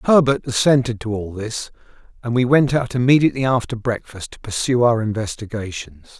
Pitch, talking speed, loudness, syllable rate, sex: 120 Hz, 155 wpm, -19 LUFS, 5.5 syllables/s, male